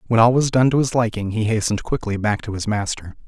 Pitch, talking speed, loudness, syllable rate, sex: 110 Hz, 255 wpm, -20 LUFS, 6.3 syllables/s, male